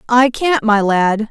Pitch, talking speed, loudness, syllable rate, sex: 230 Hz, 185 wpm, -14 LUFS, 3.5 syllables/s, female